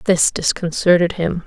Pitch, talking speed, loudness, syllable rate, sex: 175 Hz, 125 wpm, -17 LUFS, 4.5 syllables/s, female